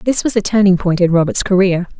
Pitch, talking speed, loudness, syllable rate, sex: 190 Hz, 240 wpm, -14 LUFS, 5.9 syllables/s, female